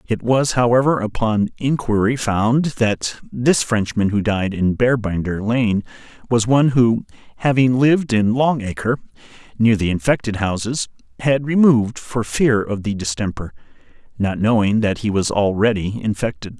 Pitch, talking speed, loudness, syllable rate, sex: 115 Hz, 145 wpm, -18 LUFS, 4.6 syllables/s, male